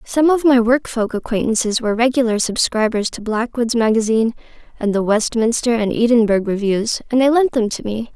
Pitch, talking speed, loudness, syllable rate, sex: 230 Hz, 175 wpm, -17 LUFS, 5.5 syllables/s, female